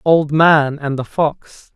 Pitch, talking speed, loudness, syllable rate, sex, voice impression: 150 Hz, 170 wpm, -15 LUFS, 3.0 syllables/s, male, very masculine, slightly middle-aged, slightly thick, slightly relaxed, slightly weak, slightly bright, soft, clear, fluent, slightly cool, intellectual, slightly refreshing, sincere, calm, slightly friendly, slightly reassuring, unique, slightly elegant, slightly sweet, slightly lively, kind, modest, slightly light